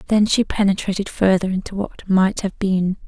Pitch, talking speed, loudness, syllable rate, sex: 195 Hz, 175 wpm, -19 LUFS, 5.0 syllables/s, female